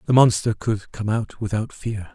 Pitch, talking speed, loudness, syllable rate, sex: 105 Hz, 195 wpm, -22 LUFS, 4.6 syllables/s, male